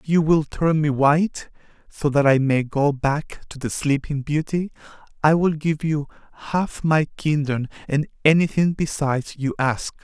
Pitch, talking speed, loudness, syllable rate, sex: 150 Hz, 165 wpm, -21 LUFS, 4.3 syllables/s, male